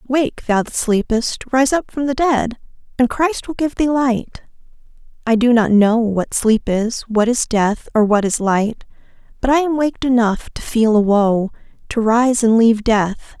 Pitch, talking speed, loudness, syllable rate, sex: 235 Hz, 195 wpm, -16 LUFS, 4.4 syllables/s, female